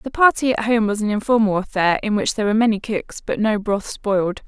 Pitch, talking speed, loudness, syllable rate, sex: 215 Hz, 240 wpm, -19 LUFS, 6.0 syllables/s, female